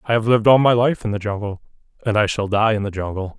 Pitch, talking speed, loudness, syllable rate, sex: 110 Hz, 285 wpm, -18 LUFS, 6.7 syllables/s, male